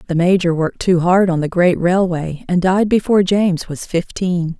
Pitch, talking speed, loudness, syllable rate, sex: 175 Hz, 195 wpm, -16 LUFS, 5.1 syllables/s, female